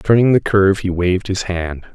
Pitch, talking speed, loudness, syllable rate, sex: 95 Hz, 215 wpm, -16 LUFS, 5.5 syllables/s, male